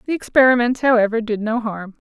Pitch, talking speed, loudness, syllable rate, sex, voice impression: 230 Hz, 175 wpm, -17 LUFS, 5.9 syllables/s, female, very feminine, slightly young, very adult-like, very thin, slightly relaxed, slightly weak, slightly dark, soft, slightly muffled, fluent, very cute, intellectual, refreshing, very sincere, very calm, friendly, reassuring, very unique, elegant, slightly wild, very sweet, slightly lively, very kind, slightly sharp, modest, light